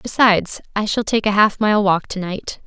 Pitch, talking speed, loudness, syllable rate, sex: 205 Hz, 225 wpm, -18 LUFS, 4.9 syllables/s, female